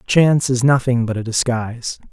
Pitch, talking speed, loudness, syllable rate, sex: 125 Hz, 170 wpm, -17 LUFS, 5.4 syllables/s, male